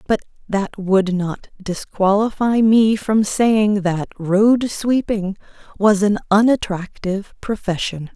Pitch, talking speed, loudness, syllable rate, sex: 205 Hz, 110 wpm, -18 LUFS, 3.6 syllables/s, female